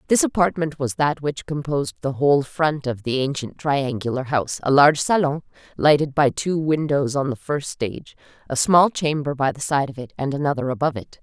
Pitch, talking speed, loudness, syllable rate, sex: 140 Hz, 200 wpm, -21 LUFS, 5.4 syllables/s, female